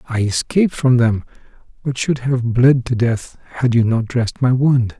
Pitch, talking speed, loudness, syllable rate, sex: 125 Hz, 190 wpm, -17 LUFS, 4.8 syllables/s, male